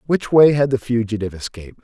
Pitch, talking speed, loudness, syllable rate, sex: 120 Hz, 195 wpm, -17 LUFS, 6.6 syllables/s, male